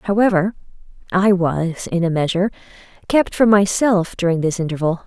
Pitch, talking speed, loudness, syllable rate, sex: 185 Hz, 140 wpm, -18 LUFS, 5.2 syllables/s, female